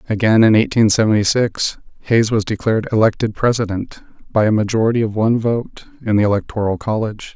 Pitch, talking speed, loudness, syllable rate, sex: 110 Hz, 165 wpm, -16 LUFS, 6.0 syllables/s, male